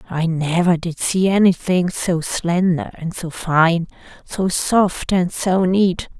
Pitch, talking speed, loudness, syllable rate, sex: 175 Hz, 145 wpm, -18 LUFS, 3.4 syllables/s, female